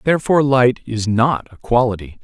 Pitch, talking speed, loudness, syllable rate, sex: 120 Hz, 160 wpm, -17 LUFS, 5.3 syllables/s, male